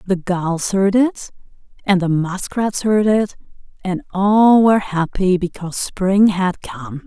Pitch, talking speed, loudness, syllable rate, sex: 190 Hz, 145 wpm, -17 LUFS, 3.8 syllables/s, female